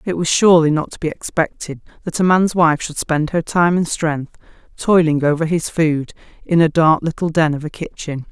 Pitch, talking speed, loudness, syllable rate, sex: 160 Hz, 210 wpm, -17 LUFS, 5.1 syllables/s, female